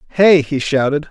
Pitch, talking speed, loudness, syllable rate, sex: 150 Hz, 165 wpm, -14 LUFS, 5.3 syllables/s, male